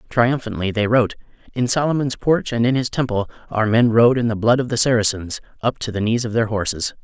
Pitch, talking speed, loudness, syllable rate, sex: 115 Hz, 220 wpm, -19 LUFS, 5.9 syllables/s, male